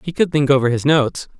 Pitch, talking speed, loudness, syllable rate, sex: 140 Hz, 260 wpm, -16 LUFS, 6.6 syllables/s, male